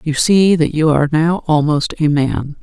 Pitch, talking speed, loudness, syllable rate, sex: 155 Hz, 205 wpm, -14 LUFS, 4.6 syllables/s, female